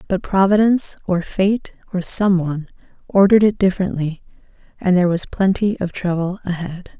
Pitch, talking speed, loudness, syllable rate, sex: 185 Hz, 145 wpm, -18 LUFS, 5.6 syllables/s, female